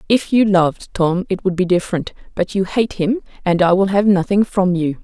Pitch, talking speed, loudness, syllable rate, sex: 190 Hz, 225 wpm, -17 LUFS, 5.3 syllables/s, female